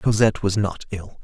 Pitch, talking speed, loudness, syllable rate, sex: 100 Hz, 195 wpm, -22 LUFS, 5.2 syllables/s, male